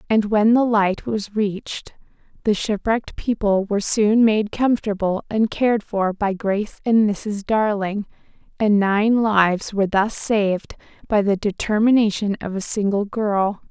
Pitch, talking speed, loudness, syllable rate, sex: 210 Hz, 150 wpm, -20 LUFS, 4.5 syllables/s, female